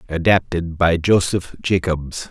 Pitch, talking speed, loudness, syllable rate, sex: 85 Hz, 105 wpm, -19 LUFS, 3.9 syllables/s, male